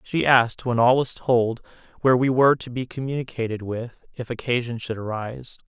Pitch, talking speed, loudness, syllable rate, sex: 120 Hz, 180 wpm, -22 LUFS, 5.6 syllables/s, male